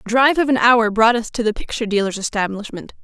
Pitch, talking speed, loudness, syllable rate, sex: 225 Hz, 235 wpm, -17 LUFS, 6.6 syllables/s, female